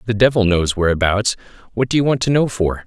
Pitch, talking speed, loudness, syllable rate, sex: 105 Hz, 230 wpm, -17 LUFS, 6.0 syllables/s, male